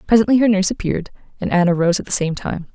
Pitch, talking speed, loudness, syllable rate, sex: 190 Hz, 240 wpm, -18 LUFS, 7.4 syllables/s, female